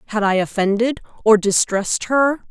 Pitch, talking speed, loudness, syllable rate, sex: 220 Hz, 145 wpm, -18 LUFS, 5.2 syllables/s, female